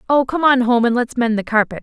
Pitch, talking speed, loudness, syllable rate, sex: 245 Hz, 295 wpm, -16 LUFS, 6.1 syllables/s, female